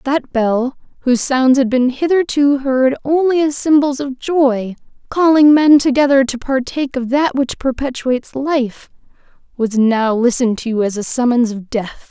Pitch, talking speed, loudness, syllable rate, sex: 260 Hz, 150 wpm, -15 LUFS, 4.5 syllables/s, female